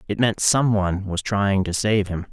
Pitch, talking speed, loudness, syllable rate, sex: 100 Hz, 205 wpm, -21 LUFS, 4.7 syllables/s, male